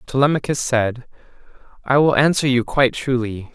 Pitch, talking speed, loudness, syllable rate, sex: 130 Hz, 135 wpm, -18 LUFS, 5.2 syllables/s, male